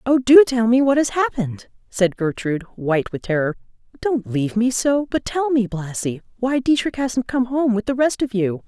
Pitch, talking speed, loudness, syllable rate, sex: 235 Hz, 205 wpm, -20 LUFS, 5.2 syllables/s, female